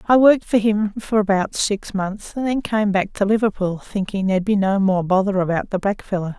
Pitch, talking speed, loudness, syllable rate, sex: 200 Hz, 215 wpm, -20 LUFS, 5.3 syllables/s, female